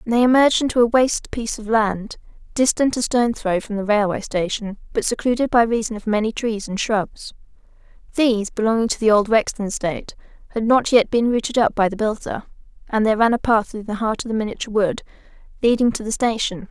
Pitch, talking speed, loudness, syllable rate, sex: 220 Hz, 205 wpm, -20 LUFS, 6.1 syllables/s, female